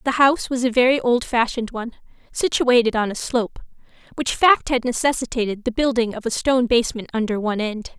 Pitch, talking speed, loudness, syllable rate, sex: 240 Hz, 180 wpm, -20 LUFS, 6.3 syllables/s, female